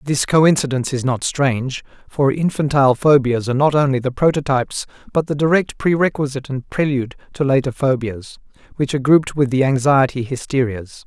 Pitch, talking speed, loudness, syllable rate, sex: 135 Hz, 155 wpm, -18 LUFS, 5.8 syllables/s, male